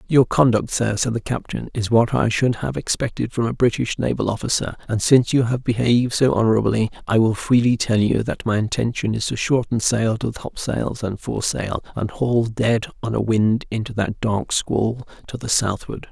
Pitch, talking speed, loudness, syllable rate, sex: 115 Hz, 200 wpm, -20 LUFS, 5.1 syllables/s, male